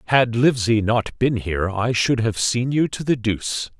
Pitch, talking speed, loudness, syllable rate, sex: 115 Hz, 205 wpm, -20 LUFS, 4.8 syllables/s, male